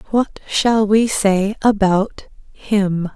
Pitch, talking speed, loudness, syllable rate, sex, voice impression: 205 Hz, 115 wpm, -17 LUFS, 2.6 syllables/s, female, very feminine, slightly young, very adult-like, thin, slightly relaxed, slightly weak, bright, slightly soft, clear, fluent, cute, intellectual, very refreshing, sincere, calm, very friendly, very reassuring, unique, very elegant, sweet, lively, very kind, modest, slightly light